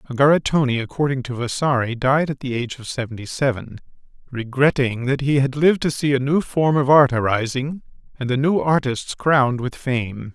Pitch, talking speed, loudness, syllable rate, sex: 135 Hz, 180 wpm, -20 LUFS, 5.4 syllables/s, male